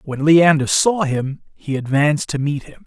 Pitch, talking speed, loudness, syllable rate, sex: 150 Hz, 190 wpm, -17 LUFS, 4.5 syllables/s, male